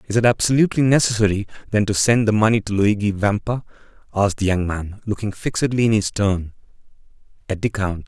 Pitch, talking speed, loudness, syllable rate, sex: 105 Hz, 180 wpm, -19 LUFS, 6.1 syllables/s, male